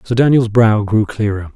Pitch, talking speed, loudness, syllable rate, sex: 110 Hz, 195 wpm, -14 LUFS, 4.8 syllables/s, male